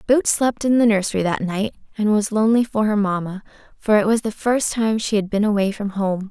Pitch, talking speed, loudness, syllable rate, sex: 210 Hz, 240 wpm, -19 LUFS, 5.6 syllables/s, female